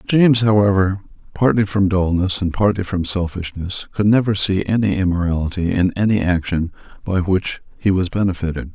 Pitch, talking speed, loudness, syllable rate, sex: 95 Hz, 150 wpm, -18 LUFS, 5.2 syllables/s, male